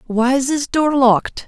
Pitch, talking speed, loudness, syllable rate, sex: 260 Hz, 205 wpm, -16 LUFS, 4.6 syllables/s, female